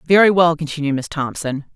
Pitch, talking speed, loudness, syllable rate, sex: 155 Hz, 170 wpm, -18 LUFS, 5.6 syllables/s, female